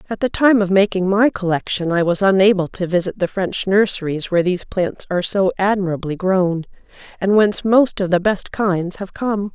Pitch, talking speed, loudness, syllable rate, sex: 190 Hz, 195 wpm, -18 LUFS, 5.3 syllables/s, female